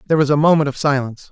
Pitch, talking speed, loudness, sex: 145 Hz, 275 wpm, -16 LUFS, male